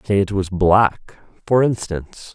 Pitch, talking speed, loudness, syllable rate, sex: 100 Hz, 155 wpm, -18 LUFS, 3.9 syllables/s, male